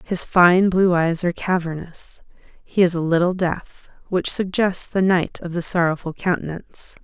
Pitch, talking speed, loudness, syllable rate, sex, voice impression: 175 Hz, 160 wpm, -20 LUFS, 4.5 syllables/s, female, feminine, adult-like, slightly relaxed, powerful, slightly soft, fluent, raspy, intellectual, slightly calm, friendly, reassuring, elegant, kind, modest